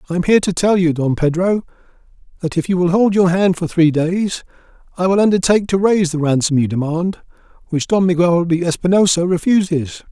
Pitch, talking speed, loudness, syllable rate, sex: 175 Hz, 195 wpm, -16 LUFS, 5.8 syllables/s, male